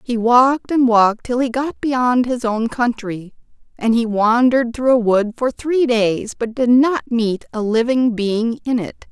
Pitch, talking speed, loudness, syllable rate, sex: 240 Hz, 190 wpm, -17 LUFS, 4.2 syllables/s, female